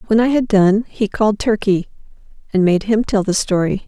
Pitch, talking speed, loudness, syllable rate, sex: 205 Hz, 200 wpm, -16 LUFS, 5.3 syllables/s, female